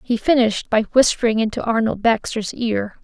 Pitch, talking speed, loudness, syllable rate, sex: 225 Hz, 160 wpm, -19 LUFS, 5.1 syllables/s, female